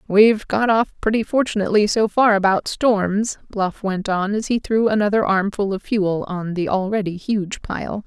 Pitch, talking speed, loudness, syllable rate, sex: 205 Hz, 180 wpm, -19 LUFS, 4.7 syllables/s, female